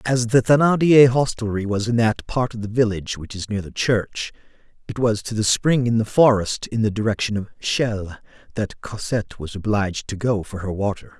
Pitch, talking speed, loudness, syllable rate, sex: 110 Hz, 205 wpm, -21 LUFS, 5.3 syllables/s, male